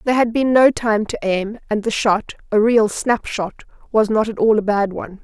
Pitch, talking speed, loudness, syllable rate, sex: 215 Hz, 220 wpm, -18 LUFS, 5.2 syllables/s, female